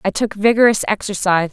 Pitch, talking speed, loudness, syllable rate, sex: 205 Hz, 160 wpm, -16 LUFS, 6.5 syllables/s, female